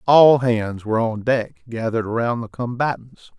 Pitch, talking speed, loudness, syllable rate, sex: 120 Hz, 160 wpm, -20 LUFS, 4.8 syllables/s, male